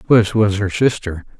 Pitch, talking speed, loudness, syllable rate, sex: 105 Hz, 170 wpm, -17 LUFS, 4.5 syllables/s, male